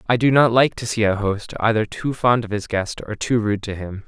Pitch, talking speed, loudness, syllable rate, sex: 110 Hz, 280 wpm, -20 LUFS, 5.2 syllables/s, male